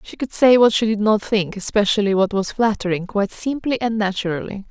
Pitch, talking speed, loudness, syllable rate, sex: 210 Hz, 180 wpm, -19 LUFS, 5.7 syllables/s, female